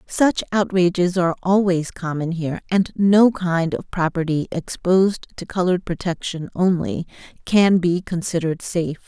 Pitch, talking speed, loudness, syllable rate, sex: 180 Hz, 130 wpm, -20 LUFS, 4.9 syllables/s, female